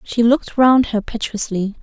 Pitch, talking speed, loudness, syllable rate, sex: 230 Hz, 165 wpm, -17 LUFS, 4.8 syllables/s, female